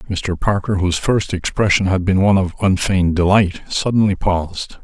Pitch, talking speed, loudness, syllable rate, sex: 95 Hz, 160 wpm, -17 LUFS, 5.4 syllables/s, male